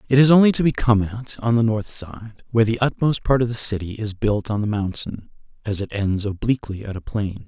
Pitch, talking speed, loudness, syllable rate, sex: 110 Hz, 240 wpm, -21 LUFS, 5.5 syllables/s, male